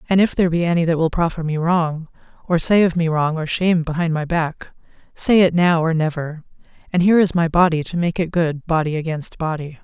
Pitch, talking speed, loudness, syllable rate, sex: 165 Hz, 225 wpm, -18 LUFS, 5.8 syllables/s, female